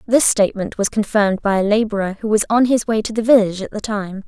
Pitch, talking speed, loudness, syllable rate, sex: 210 Hz, 255 wpm, -17 LUFS, 6.4 syllables/s, female